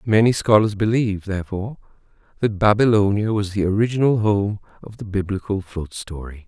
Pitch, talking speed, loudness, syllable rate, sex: 100 Hz, 140 wpm, -20 LUFS, 5.6 syllables/s, male